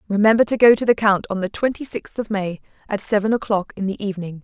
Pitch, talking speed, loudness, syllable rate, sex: 205 Hz, 245 wpm, -19 LUFS, 6.4 syllables/s, female